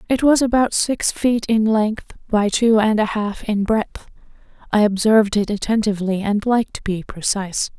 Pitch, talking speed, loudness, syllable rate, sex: 215 Hz, 175 wpm, -18 LUFS, 4.7 syllables/s, female